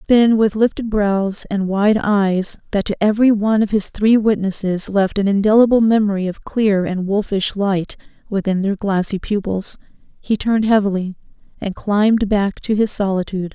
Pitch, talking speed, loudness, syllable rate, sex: 205 Hz, 165 wpm, -17 LUFS, 4.9 syllables/s, female